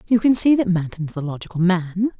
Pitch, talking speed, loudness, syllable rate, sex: 190 Hz, 220 wpm, -19 LUFS, 5.6 syllables/s, female